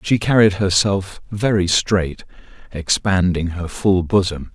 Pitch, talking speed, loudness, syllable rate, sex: 95 Hz, 120 wpm, -18 LUFS, 3.8 syllables/s, male